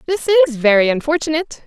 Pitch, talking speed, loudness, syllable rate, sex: 295 Hz, 145 wpm, -15 LUFS, 7.1 syllables/s, female